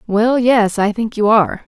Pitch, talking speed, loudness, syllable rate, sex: 220 Hz, 205 wpm, -15 LUFS, 4.6 syllables/s, female